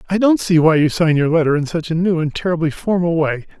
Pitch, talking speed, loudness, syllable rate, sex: 165 Hz, 265 wpm, -16 LUFS, 6.1 syllables/s, male